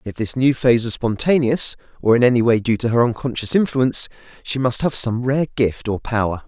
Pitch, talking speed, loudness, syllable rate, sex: 120 Hz, 215 wpm, -18 LUFS, 5.6 syllables/s, male